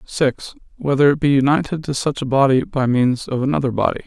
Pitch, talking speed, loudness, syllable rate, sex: 135 Hz, 205 wpm, -18 LUFS, 6.1 syllables/s, male